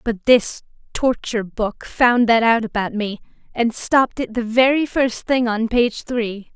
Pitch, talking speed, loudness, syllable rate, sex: 230 Hz, 175 wpm, -19 LUFS, 4.1 syllables/s, female